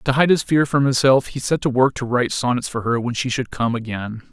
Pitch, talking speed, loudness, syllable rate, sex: 125 Hz, 280 wpm, -19 LUFS, 5.7 syllables/s, male